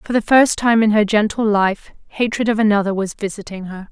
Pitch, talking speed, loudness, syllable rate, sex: 210 Hz, 215 wpm, -16 LUFS, 5.4 syllables/s, female